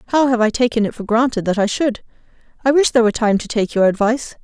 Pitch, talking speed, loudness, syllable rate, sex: 230 Hz, 245 wpm, -17 LUFS, 7.1 syllables/s, female